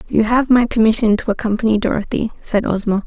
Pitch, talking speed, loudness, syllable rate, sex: 220 Hz, 175 wpm, -16 LUFS, 6.0 syllables/s, female